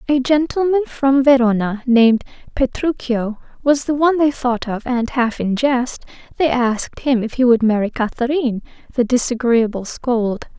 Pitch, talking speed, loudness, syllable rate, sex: 250 Hz, 155 wpm, -17 LUFS, 4.7 syllables/s, female